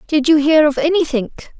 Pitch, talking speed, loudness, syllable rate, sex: 295 Hz, 190 wpm, -14 LUFS, 5.0 syllables/s, female